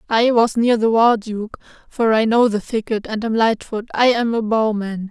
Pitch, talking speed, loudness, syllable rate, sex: 225 Hz, 225 wpm, -18 LUFS, 4.7 syllables/s, female